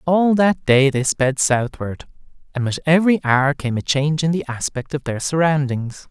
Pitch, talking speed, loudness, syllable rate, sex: 145 Hz, 185 wpm, -18 LUFS, 4.8 syllables/s, male